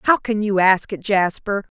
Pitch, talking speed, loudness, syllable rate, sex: 200 Hz, 200 wpm, -19 LUFS, 4.6 syllables/s, female